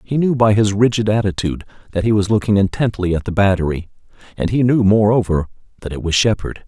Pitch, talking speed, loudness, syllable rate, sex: 100 Hz, 200 wpm, -17 LUFS, 6.2 syllables/s, male